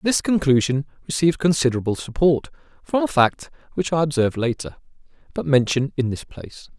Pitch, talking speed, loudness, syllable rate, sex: 145 Hz, 150 wpm, -21 LUFS, 5.9 syllables/s, male